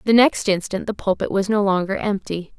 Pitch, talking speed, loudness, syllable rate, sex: 200 Hz, 210 wpm, -20 LUFS, 5.4 syllables/s, female